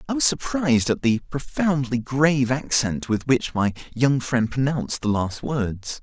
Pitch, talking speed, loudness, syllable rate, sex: 130 Hz, 170 wpm, -22 LUFS, 4.4 syllables/s, male